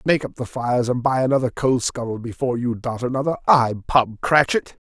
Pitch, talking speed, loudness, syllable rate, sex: 125 Hz, 195 wpm, -21 LUFS, 5.5 syllables/s, male